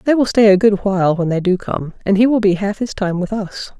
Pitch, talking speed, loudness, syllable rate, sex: 200 Hz, 300 wpm, -16 LUFS, 5.8 syllables/s, female